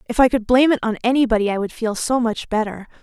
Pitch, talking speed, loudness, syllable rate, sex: 230 Hz, 260 wpm, -19 LUFS, 6.7 syllables/s, female